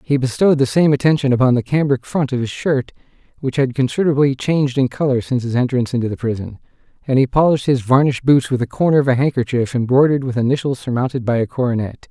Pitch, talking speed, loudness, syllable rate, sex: 130 Hz, 215 wpm, -17 LUFS, 6.9 syllables/s, male